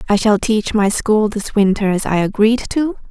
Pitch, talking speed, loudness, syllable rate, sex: 215 Hz, 215 wpm, -16 LUFS, 4.7 syllables/s, female